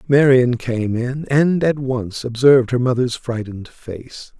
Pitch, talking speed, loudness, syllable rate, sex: 125 Hz, 150 wpm, -17 LUFS, 4.0 syllables/s, male